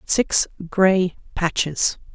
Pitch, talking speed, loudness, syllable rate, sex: 180 Hz, 85 wpm, -20 LUFS, 2.6 syllables/s, female